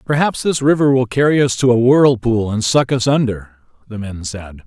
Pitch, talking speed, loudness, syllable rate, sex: 120 Hz, 205 wpm, -15 LUFS, 5.0 syllables/s, male